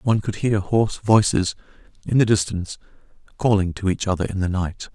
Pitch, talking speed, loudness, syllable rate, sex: 100 Hz, 180 wpm, -21 LUFS, 5.8 syllables/s, male